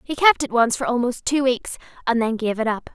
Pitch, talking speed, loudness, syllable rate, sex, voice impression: 245 Hz, 265 wpm, -21 LUFS, 5.5 syllables/s, female, feminine, young, bright, slightly fluent, cute, refreshing, friendly, lively